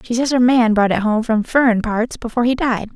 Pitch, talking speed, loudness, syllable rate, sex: 230 Hz, 265 wpm, -16 LUFS, 5.7 syllables/s, female